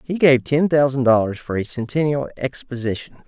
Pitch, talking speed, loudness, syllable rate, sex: 135 Hz, 165 wpm, -20 LUFS, 5.3 syllables/s, male